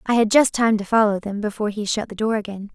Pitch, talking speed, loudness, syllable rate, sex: 215 Hz, 285 wpm, -20 LUFS, 6.5 syllables/s, female